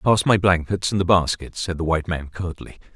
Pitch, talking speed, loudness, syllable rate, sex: 85 Hz, 225 wpm, -21 LUFS, 5.5 syllables/s, male